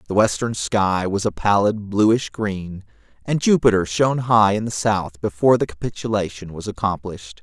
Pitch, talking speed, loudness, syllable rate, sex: 105 Hz, 160 wpm, -20 LUFS, 5.0 syllables/s, male